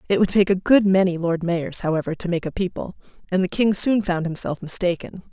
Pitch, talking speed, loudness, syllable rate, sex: 180 Hz, 225 wpm, -21 LUFS, 5.7 syllables/s, female